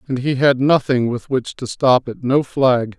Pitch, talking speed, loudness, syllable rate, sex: 130 Hz, 220 wpm, -17 LUFS, 4.2 syllables/s, male